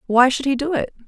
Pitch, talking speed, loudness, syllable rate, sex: 265 Hz, 280 wpm, -19 LUFS, 6.1 syllables/s, female